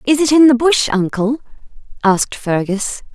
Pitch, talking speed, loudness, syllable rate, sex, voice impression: 245 Hz, 155 wpm, -15 LUFS, 4.8 syllables/s, female, slightly feminine, slightly adult-like, sincere, slightly calm